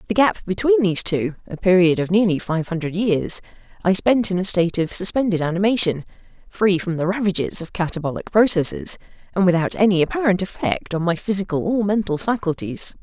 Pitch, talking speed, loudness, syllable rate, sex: 185 Hz, 175 wpm, -20 LUFS, 5.8 syllables/s, female